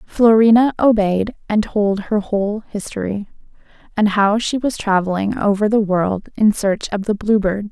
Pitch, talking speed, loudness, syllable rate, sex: 205 Hz, 165 wpm, -17 LUFS, 4.5 syllables/s, female